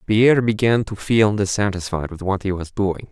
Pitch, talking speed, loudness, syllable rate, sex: 100 Hz, 195 wpm, -19 LUFS, 5.1 syllables/s, male